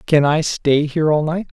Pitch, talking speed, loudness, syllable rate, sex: 155 Hz, 230 wpm, -17 LUFS, 5.2 syllables/s, male